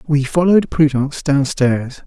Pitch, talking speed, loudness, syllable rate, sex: 145 Hz, 115 wpm, -16 LUFS, 4.7 syllables/s, male